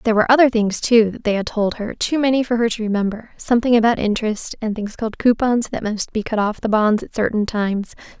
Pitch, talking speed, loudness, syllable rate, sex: 220 Hz, 225 wpm, -19 LUFS, 6.2 syllables/s, female